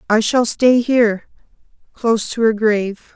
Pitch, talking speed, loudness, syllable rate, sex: 225 Hz, 135 wpm, -16 LUFS, 4.7 syllables/s, female